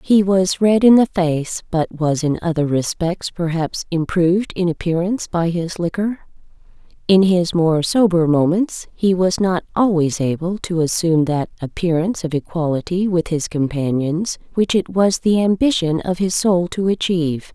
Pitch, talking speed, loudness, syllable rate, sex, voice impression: 175 Hz, 160 wpm, -18 LUFS, 4.6 syllables/s, female, feminine, adult-like, slightly sincere, calm, friendly, reassuring